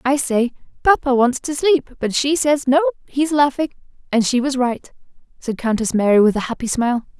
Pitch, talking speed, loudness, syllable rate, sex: 265 Hz, 190 wpm, -18 LUFS, 5.3 syllables/s, female